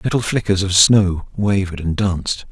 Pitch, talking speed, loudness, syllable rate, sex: 95 Hz, 165 wpm, -17 LUFS, 5.0 syllables/s, male